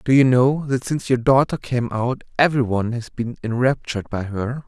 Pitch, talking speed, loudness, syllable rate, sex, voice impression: 125 Hz, 190 wpm, -20 LUFS, 5.3 syllables/s, male, masculine, adult-like, tensed, slightly powerful, bright, clear, cool, intellectual, calm, friendly, reassuring, wild, lively, slightly kind